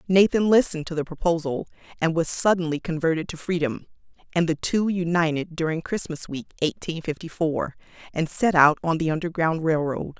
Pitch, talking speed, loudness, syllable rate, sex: 165 Hz, 170 wpm, -24 LUFS, 5.5 syllables/s, female